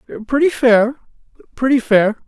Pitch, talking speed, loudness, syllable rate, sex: 245 Hz, 80 wpm, -15 LUFS, 5.8 syllables/s, male